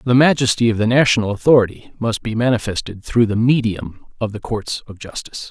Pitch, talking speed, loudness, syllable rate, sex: 115 Hz, 185 wpm, -17 LUFS, 5.8 syllables/s, male